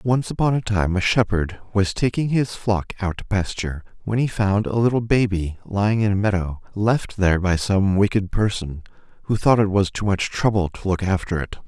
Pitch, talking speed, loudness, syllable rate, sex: 100 Hz, 205 wpm, -21 LUFS, 5.1 syllables/s, male